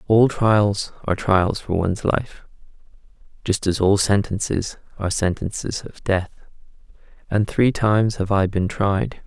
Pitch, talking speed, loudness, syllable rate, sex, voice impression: 100 Hz, 140 wpm, -21 LUFS, 4.3 syllables/s, male, masculine, adult-like, tensed, powerful, weak, slightly dark, slightly muffled, cool, intellectual, calm, reassuring, slightly wild, kind, modest